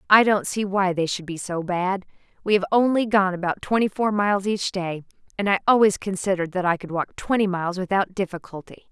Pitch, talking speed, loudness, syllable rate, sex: 190 Hz, 210 wpm, -22 LUFS, 5.8 syllables/s, female